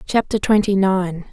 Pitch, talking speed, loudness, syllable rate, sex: 195 Hz, 135 wpm, -18 LUFS, 4.5 syllables/s, female